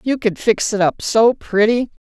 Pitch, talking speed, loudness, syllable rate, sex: 220 Hz, 200 wpm, -16 LUFS, 4.4 syllables/s, female